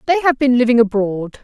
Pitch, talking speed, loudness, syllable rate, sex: 245 Hz, 210 wpm, -15 LUFS, 5.6 syllables/s, female